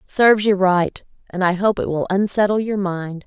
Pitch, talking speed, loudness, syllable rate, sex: 190 Hz, 200 wpm, -18 LUFS, 4.8 syllables/s, female